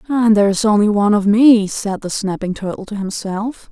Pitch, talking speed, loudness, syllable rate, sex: 205 Hz, 210 wpm, -16 LUFS, 5.4 syllables/s, female